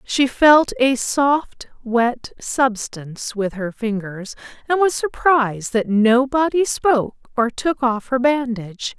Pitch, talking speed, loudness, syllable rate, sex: 250 Hz, 135 wpm, -18 LUFS, 3.7 syllables/s, female